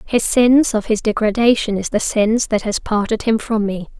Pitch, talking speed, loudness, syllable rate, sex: 220 Hz, 210 wpm, -17 LUFS, 5.3 syllables/s, female